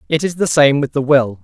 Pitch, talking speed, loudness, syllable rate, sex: 140 Hz, 290 wpm, -15 LUFS, 5.6 syllables/s, male